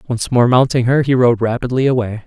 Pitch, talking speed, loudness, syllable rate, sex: 125 Hz, 210 wpm, -15 LUFS, 5.8 syllables/s, male